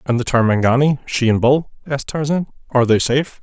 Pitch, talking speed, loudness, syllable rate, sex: 130 Hz, 195 wpm, -17 LUFS, 6.3 syllables/s, male